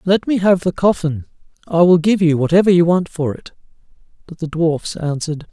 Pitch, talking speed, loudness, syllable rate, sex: 170 Hz, 195 wpm, -16 LUFS, 5.4 syllables/s, male